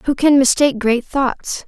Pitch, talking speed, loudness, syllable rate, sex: 265 Hz, 180 wpm, -15 LUFS, 4.3 syllables/s, female